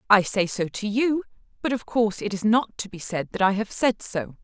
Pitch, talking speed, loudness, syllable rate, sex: 210 Hz, 255 wpm, -24 LUFS, 5.2 syllables/s, female